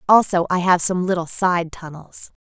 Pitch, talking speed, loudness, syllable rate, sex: 175 Hz, 175 wpm, -18 LUFS, 4.7 syllables/s, female